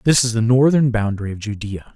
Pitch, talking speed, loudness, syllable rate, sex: 115 Hz, 215 wpm, -18 LUFS, 6.0 syllables/s, male